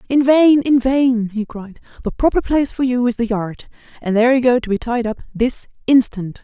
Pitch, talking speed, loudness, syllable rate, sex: 245 Hz, 225 wpm, -16 LUFS, 5.2 syllables/s, female